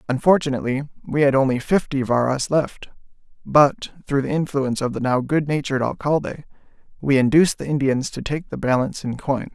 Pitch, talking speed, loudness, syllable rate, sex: 140 Hz, 165 wpm, -20 LUFS, 5.8 syllables/s, male